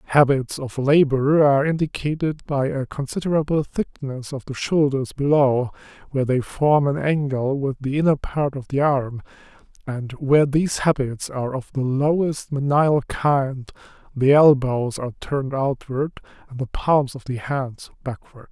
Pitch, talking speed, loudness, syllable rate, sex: 140 Hz, 150 wpm, -21 LUFS, 4.5 syllables/s, male